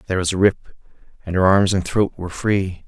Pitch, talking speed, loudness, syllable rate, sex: 95 Hz, 230 wpm, -19 LUFS, 6.1 syllables/s, male